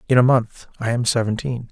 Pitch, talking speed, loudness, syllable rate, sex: 120 Hz, 210 wpm, -20 LUFS, 5.6 syllables/s, male